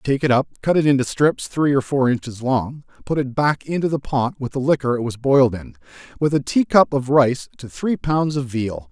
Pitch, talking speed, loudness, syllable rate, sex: 135 Hz, 240 wpm, -19 LUFS, 5.2 syllables/s, male